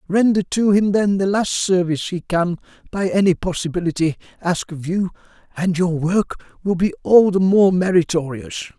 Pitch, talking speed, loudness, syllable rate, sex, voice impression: 180 Hz, 165 wpm, -19 LUFS, 4.9 syllables/s, male, very masculine, very adult-like, very old, thick, slightly relaxed, weak, slightly dark, slightly hard, slightly muffled, fluent, slightly raspy, cool, intellectual, sincere, calm, very mature, slightly friendly, reassuring, unique, slightly wild, slightly strict